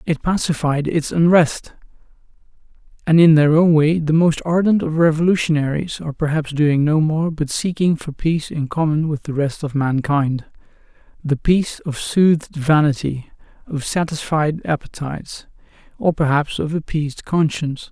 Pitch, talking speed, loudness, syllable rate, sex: 155 Hz, 140 wpm, -18 LUFS, 4.9 syllables/s, male